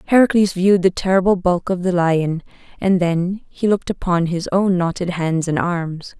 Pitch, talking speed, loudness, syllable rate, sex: 180 Hz, 185 wpm, -18 LUFS, 4.9 syllables/s, female